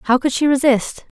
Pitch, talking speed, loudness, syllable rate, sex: 265 Hz, 205 wpm, -16 LUFS, 4.8 syllables/s, female